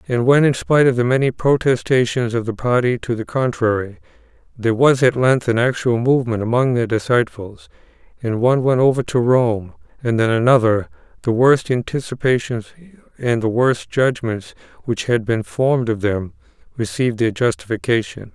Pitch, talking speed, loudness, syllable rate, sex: 120 Hz, 160 wpm, -18 LUFS, 5.2 syllables/s, male